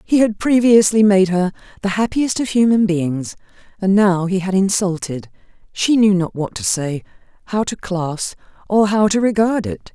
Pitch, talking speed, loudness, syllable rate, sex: 195 Hz, 170 wpm, -17 LUFS, 4.6 syllables/s, female